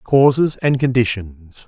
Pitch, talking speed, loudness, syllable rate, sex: 120 Hz, 105 wpm, -16 LUFS, 4.1 syllables/s, male